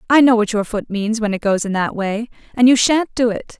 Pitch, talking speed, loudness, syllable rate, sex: 225 Hz, 285 wpm, -17 LUFS, 5.5 syllables/s, female